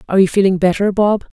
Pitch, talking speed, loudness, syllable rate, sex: 195 Hz, 215 wpm, -14 LUFS, 7.1 syllables/s, female